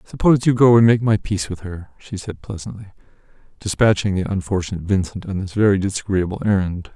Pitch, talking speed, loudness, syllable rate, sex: 100 Hz, 180 wpm, -19 LUFS, 6.3 syllables/s, male